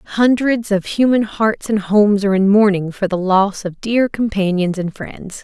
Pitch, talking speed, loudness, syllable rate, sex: 205 Hz, 190 wpm, -16 LUFS, 4.7 syllables/s, female